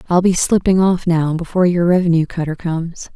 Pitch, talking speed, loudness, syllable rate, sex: 170 Hz, 190 wpm, -16 LUFS, 5.7 syllables/s, female